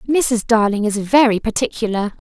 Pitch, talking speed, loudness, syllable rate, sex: 225 Hz, 130 wpm, -17 LUFS, 4.9 syllables/s, female